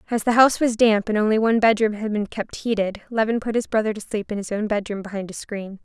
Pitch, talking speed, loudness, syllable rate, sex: 215 Hz, 265 wpm, -21 LUFS, 6.4 syllables/s, female